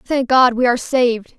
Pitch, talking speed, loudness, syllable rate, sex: 250 Hz, 215 wpm, -15 LUFS, 5.9 syllables/s, female